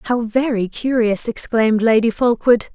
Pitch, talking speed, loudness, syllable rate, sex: 230 Hz, 130 wpm, -17 LUFS, 4.9 syllables/s, female